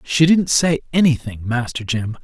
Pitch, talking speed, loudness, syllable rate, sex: 135 Hz, 160 wpm, -18 LUFS, 4.6 syllables/s, male